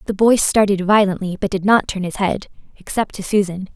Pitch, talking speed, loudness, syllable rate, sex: 195 Hz, 190 wpm, -18 LUFS, 5.5 syllables/s, female